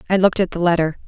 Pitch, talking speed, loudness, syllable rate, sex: 180 Hz, 280 wpm, -18 LUFS, 8.5 syllables/s, female